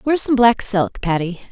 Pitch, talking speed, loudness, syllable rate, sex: 210 Hz, 200 wpm, -17 LUFS, 5.2 syllables/s, female